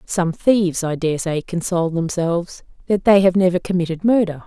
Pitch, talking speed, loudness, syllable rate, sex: 175 Hz, 175 wpm, -18 LUFS, 5.3 syllables/s, female